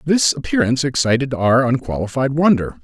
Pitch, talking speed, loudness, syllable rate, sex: 135 Hz, 125 wpm, -17 LUFS, 5.5 syllables/s, male